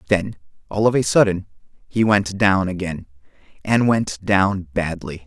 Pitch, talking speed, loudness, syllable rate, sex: 95 Hz, 150 wpm, -19 LUFS, 4.4 syllables/s, male